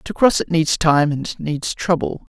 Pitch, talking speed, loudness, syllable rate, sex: 160 Hz, 205 wpm, -19 LUFS, 4.0 syllables/s, male